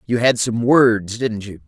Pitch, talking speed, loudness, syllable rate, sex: 110 Hz, 215 wpm, -17 LUFS, 4.0 syllables/s, male